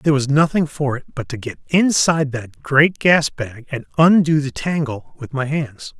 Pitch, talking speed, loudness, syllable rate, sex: 145 Hz, 200 wpm, -18 LUFS, 4.7 syllables/s, male